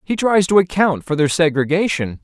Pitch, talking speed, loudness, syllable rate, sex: 170 Hz, 190 wpm, -16 LUFS, 5.2 syllables/s, male